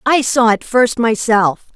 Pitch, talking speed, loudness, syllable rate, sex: 230 Hz, 170 wpm, -14 LUFS, 3.8 syllables/s, female